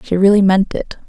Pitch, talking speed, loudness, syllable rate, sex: 195 Hz, 220 wpm, -13 LUFS, 5.4 syllables/s, female